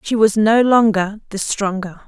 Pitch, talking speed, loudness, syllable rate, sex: 210 Hz, 175 wpm, -16 LUFS, 4.4 syllables/s, female